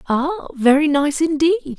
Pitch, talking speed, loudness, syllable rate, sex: 300 Hz, 135 wpm, -17 LUFS, 3.8 syllables/s, female